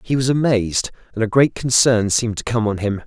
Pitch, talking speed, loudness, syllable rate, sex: 115 Hz, 235 wpm, -18 LUFS, 5.9 syllables/s, male